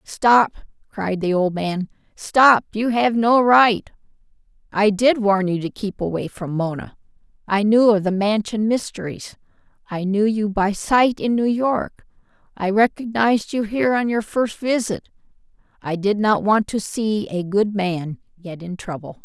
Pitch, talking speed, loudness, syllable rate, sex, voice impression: 210 Hz, 150 wpm, -19 LUFS, 4.2 syllables/s, female, very feminine, slightly young, slightly adult-like, thin, slightly tensed, slightly powerful, slightly dark, very hard, clear, slightly halting, slightly nasal, cute, intellectual, refreshing, sincere, very calm, very friendly, reassuring, very unique, elegant, slightly wild, very sweet, very kind, very modest, light